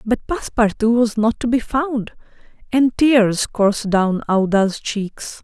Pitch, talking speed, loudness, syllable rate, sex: 225 Hz, 145 wpm, -18 LUFS, 4.1 syllables/s, female